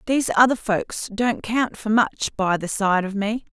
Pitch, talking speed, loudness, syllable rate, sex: 215 Hz, 205 wpm, -21 LUFS, 5.0 syllables/s, female